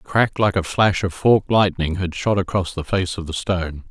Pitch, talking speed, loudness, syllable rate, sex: 95 Hz, 245 wpm, -20 LUFS, 5.3 syllables/s, male